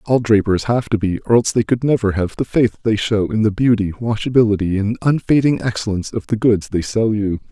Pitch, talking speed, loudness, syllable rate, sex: 110 Hz, 225 wpm, -17 LUFS, 5.8 syllables/s, male